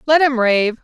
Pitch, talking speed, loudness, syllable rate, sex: 250 Hz, 215 wpm, -15 LUFS, 4.4 syllables/s, female